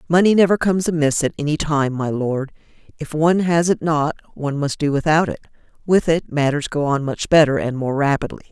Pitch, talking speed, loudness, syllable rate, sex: 155 Hz, 205 wpm, -19 LUFS, 5.8 syllables/s, female